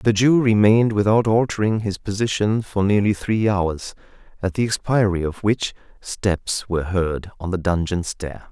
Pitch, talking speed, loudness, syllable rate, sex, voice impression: 100 Hz, 160 wpm, -20 LUFS, 4.6 syllables/s, male, masculine, adult-like, tensed, slightly bright, clear, fluent, cool, intellectual, slightly refreshing, calm, friendly, lively, kind